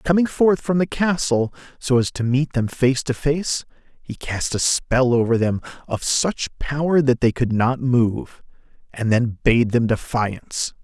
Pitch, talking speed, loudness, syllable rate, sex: 130 Hz, 175 wpm, -20 LUFS, 4.1 syllables/s, male